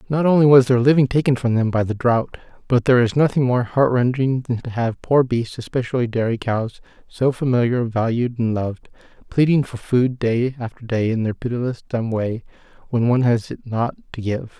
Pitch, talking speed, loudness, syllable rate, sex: 120 Hz, 195 wpm, -19 LUFS, 5.3 syllables/s, male